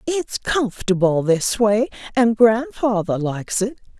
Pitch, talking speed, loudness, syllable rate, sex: 220 Hz, 120 wpm, -19 LUFS, 4.1 syllables/s, female